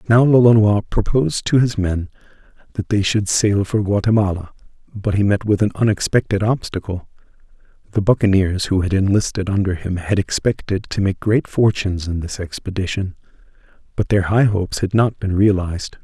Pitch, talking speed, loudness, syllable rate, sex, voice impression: 100 Hz, 160 wpm, -18 LUFS, 5.4 syllables/s, male, masculine, adult-like, slightly thick, muffled, cool, calm, reassuring, slightly elegant, slightly sweet